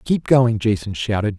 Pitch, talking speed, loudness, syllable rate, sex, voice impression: 110 Hz, 175 wpm, -18 LUFS, 4.7 syllables/s, male, masculine, middle-aged, thick, tensed, slightly hard, clear, fluent, intellectual, sincere, calm, mature, slightly friendly, slightly reassuring, slightly wild, slightly lively, slightly strict